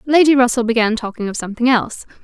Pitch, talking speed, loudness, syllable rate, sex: 235 Hz, 190 wpm, -16 LUFS, 7.1 syllables/s, female